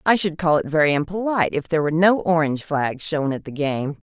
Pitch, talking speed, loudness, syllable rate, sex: 160 Hz, 235 wpm, -21 LUFS, 6.2 syllables/s, female